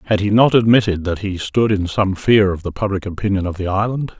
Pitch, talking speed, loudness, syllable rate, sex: 100 Hz, 245 wpm, -17 LUFS, 5.8 syllables/s, male